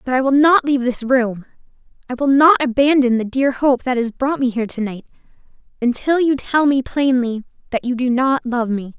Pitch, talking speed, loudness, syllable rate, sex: 255 Hz, 215 wpm, -17 LUFS, 5.3 syllables/s, female